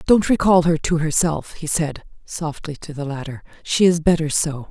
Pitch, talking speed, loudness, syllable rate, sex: 160 Hz, 190 wpm, -20 LUFS, 4.8 syllables/s, female